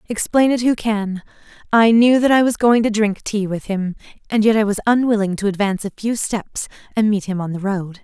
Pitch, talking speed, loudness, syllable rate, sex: 210 Hz, 225 wpm, -18 LUFS, 5.4 syllables/s, female